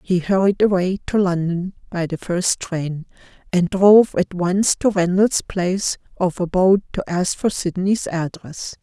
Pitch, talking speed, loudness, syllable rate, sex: 185 Hz, 155 wpm, -19 LUFS, 4.3 syllables/s, female